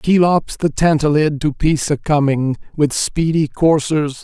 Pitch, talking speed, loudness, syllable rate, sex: 150 Hz, 125 wpm, -16 LUFS, 4.0 syllables/s, male